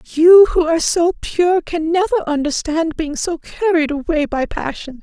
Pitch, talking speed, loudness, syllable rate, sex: 330 Hz, 165 wpm, -16 LUFS, 4.8 syllables/s, female